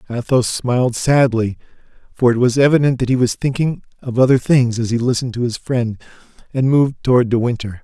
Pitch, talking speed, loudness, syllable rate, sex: 125 Hz, 190 wpm, -16 LUFS, 5.8 syllables/s, male